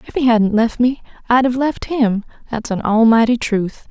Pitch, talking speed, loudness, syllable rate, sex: 235 Hz, 185 wpm, -16 LUFS, 4.7 syllables/s, female